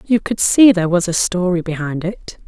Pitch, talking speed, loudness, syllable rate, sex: 185 Hz, 220 wpm, -16 LUFS, 5.2 syllables/s, female